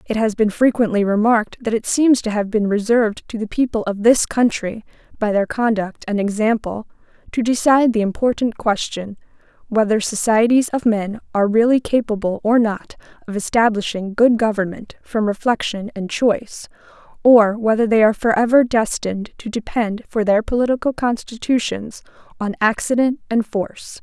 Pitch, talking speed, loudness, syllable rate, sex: 220 Hz, 150 wpm, -18 LUFS, 5.2 syllables/s, female